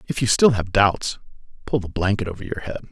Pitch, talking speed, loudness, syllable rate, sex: 105 Hz, 225 wpm, -21 LUFS, 6.1 syllables/s, male